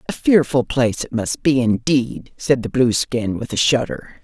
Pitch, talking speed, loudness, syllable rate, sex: 125 Hz, 185 wpm, -18 LUFS, 4.5 syllables/s, female